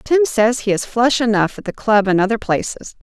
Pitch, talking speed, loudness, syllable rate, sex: 225 Hz, 235 wpm, -17 LUFS, 5.2 syllables/s, female